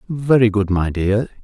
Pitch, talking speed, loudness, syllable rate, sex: 110 Hz, 170 wpm, -17 LUFS, 4.4 syllables/s, male